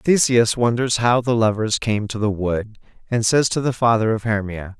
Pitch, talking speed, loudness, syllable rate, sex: 115 Hz, 200 wpm, -19 LUFS, 4.8 syllables/s, male